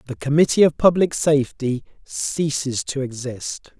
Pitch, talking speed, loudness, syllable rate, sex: 140 Hz, 125 wpm, -20 LUFS, 4.5 syllables/s, male